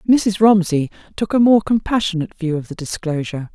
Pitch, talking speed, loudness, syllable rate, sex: 185 Hz, 170 wpm, -18 LUFS, 5.9 syllables/s, female